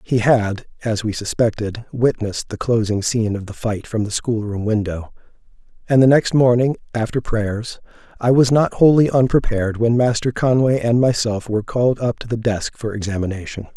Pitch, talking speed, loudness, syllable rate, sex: 115 Hz, 180 wpm, -18 LUFS, 5.2 syllables/s, male